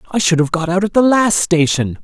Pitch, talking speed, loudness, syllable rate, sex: 175 Hz, 265 wpm, -14 LUFS, 5.5 syllables/s, male